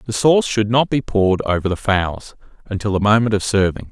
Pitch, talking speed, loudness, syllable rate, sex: 105 Hz, 215 wpm, -17 LUFS, 5.6 syllables/s, male